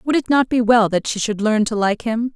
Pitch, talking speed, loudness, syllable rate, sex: 230 Hz, 305 wpm, -18 LUFS, 5.2 syllables/s, female